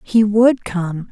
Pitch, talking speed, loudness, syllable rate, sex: 205 Hz, 160 wpm, -16 LUFS, 3.0 syllables/s, female